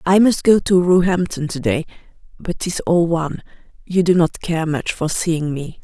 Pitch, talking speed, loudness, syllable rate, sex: 170 Hz, 195 wpm, -18 LUFS, 4.6 syllables/s, female